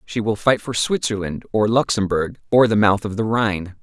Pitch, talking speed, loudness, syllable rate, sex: 105 Hz, 205 wpm, -19 LUFS, 5.1 syllables/s, male